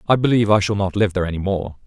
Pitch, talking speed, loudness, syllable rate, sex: 100 Hz, 290 wpm, -19 LUFS, 7.8 syllables/s, male